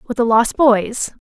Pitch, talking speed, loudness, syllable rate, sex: 235 Hz, 195 wpm, -15 LUFS, 4.0 syllables/s, female